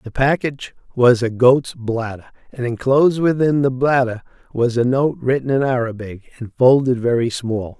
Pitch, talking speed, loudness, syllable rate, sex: 125 Hz, 160 wpm, -17 LUFS, 4.9 syllables/s, male